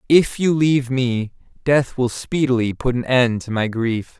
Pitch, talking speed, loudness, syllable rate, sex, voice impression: 125 Hz, 185 wpm, -19 LUFS, 4.3 syllables/s, male, very masculine, very adult-like, slightly thick, tensed, slightly powerful, bright, slightly soft, very clear, very fluent, cool, intellectual, very refreshing, sincere, calm, slightly mature, very friendly, very reassuring, slightly unique, elegant, slightly wild, sweet, lively, kind, slightly modest